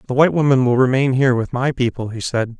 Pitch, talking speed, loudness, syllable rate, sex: 130 Hz, 255 wpm, -17 LUFS, 6.6 syllables/s, male